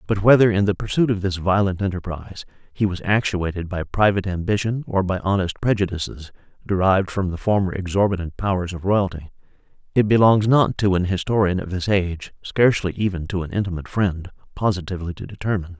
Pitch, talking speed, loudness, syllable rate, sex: 95 Hz, 170 wpm, -21 LUFS, 6.2 syllables/s, male